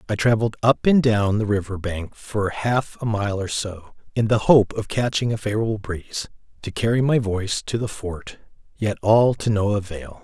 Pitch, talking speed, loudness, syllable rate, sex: 105 Hz, 200 wpm, -22 LUFS, 5.0 syllables/s, male